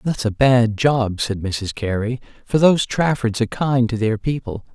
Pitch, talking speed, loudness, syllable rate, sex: 120 Hz, 190 wpm, -19 LUFS, 4.7 syllables/s, male